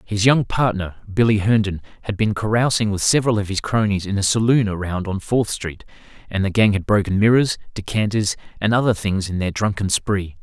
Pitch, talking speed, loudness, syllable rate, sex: 105 Hz, 195 wpm, -19 LUFS, 5.5 syllables/s, male